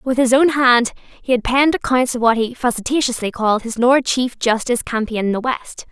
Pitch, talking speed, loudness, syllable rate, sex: 245 Hz, 215 wpm, -17 LUFS, 5.3 syllables/s, female